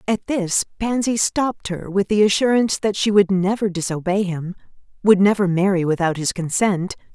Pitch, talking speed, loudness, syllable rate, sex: 195 Hz, 170 wpm, -19 LUFS, 5.2 syllables/s, female